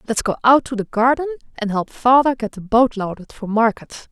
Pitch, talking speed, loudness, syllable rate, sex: 235 Hz, 220 wpm, -18 LUFS, 5.3 syllables/s, female